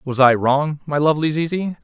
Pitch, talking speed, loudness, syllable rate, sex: 150 Hz, 195 wpm, -18 LUFS, 5.5 syllables/s, male